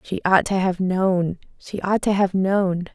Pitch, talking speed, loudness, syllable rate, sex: 190 Hz, 205 wpm, -21 LUFS, 4.0 syllables/s, female